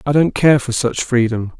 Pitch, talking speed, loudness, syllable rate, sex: 130 Hz, 225 wpm, -16 LUFS, 4.9 syllables/s, male